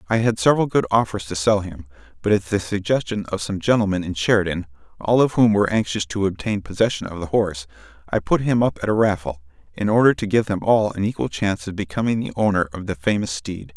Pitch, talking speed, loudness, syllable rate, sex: 100 Hz, 225 wpm, -21 LUFS, 6.2 syllables/s, male